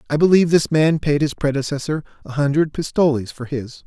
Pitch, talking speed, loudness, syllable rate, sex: 145 Hz, 185 wpm, -19 LUFS, 5.8 syllables/s, male